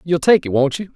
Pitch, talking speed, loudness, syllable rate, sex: 160 Hz, 315 wpm, -16 LUFS, 5.9 syllables/s, male